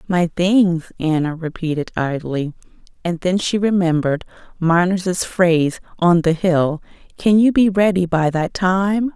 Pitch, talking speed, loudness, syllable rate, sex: 175 Hz, 140 wpm, -18 LUFS, 4.2 syllables/s, female